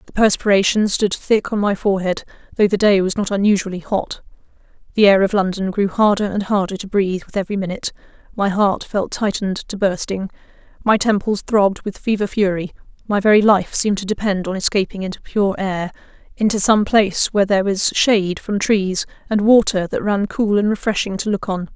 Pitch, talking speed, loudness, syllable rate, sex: 200 Hz, 190 wpm, -18 LUFS, 5.8 syllables/s, female